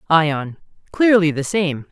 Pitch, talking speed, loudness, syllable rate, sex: 165 Hz, 125 wpm, -17 LUFS, 3.6 syllables/s, male